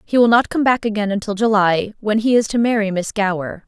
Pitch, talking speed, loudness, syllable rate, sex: 210 Hz, 245 wpm, -17 LUFS, 5.8 syllables/s, female